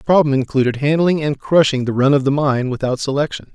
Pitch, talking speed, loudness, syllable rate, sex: 140 Hz, 220 wpm, -17 LUFS, 6.0 syllables/s, male